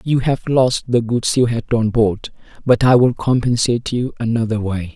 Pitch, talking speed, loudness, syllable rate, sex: 120 Hz, 195 wpm, -17 LUFS, 4.7 syllables/s, male